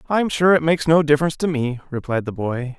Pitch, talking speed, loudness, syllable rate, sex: 150 Hz, 235 wpm, -19 LUFS, 6.2 syllables/s, male